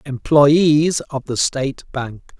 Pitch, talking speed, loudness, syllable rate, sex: 140 Hz, 125 wpm, -17 LUFS, 3.2 syllables/s, male